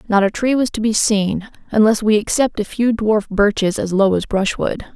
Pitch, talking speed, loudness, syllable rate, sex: 210 Hz, 220 wpm, -17 LUFS, 4.9 syllables/s, female